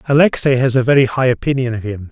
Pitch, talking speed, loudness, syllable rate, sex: 125 Hz, 225 wpm, -15 LUFS, 6.7 syllables/s, male